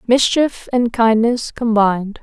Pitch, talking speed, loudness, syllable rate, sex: 230 Hz, 110 wpm, -16 LUFS, 3.8 syllables/s, female